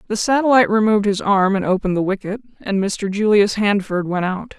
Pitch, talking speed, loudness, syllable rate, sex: 205 Hz, 195 wpm, -17 LUFS, 6.0 syllables/s, female